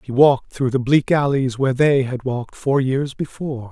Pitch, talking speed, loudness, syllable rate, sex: 135 Hz, 210 wpm, -19 LUFS, 5.3 syllables/s, male